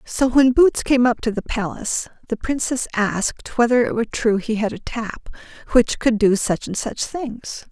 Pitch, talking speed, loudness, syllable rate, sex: 235 Hz, 200 wpm, -20 LUFS, 4.8 syllables/s, female